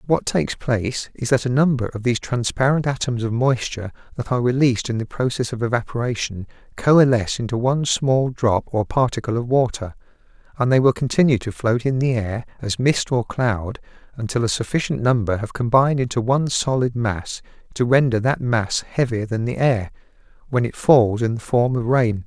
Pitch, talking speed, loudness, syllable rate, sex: 120 Hz, 185 wpm, -20 LUFS, 5.5 syllables/s, male